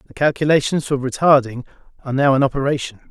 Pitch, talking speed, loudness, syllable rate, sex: 135 Hz, 155 wpm, -17 LUFS, 7.0 syllables/s, male